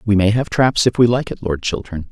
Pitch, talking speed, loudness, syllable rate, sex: 110 Hz, 285 wpm, -17 LUFS, 5.5 syllables/s, male